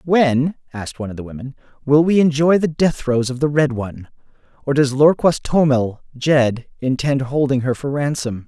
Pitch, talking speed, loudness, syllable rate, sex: 135 Hz, 185 wpm, -18 LUFS, 5.0 syllables/s, male